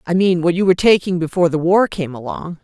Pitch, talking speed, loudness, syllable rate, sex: 175 Hz, 250 wpm, -16 LUFS, 6.4 syllables/s, female